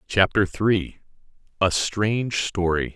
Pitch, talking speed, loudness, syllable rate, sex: 100 Hz, 80 wpm, -22 LUFS, 3.7 syllables/s, male